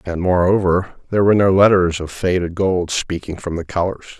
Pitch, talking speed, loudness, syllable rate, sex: 90 Hz, 185 wpm, -17 LUFS, 5.6 syllables/s, male